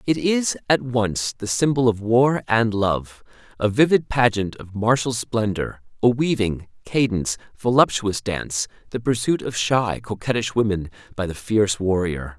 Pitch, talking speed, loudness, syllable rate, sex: 110 Hz, 150 wpm, -21 LUFS, 4.5 syllables/s, male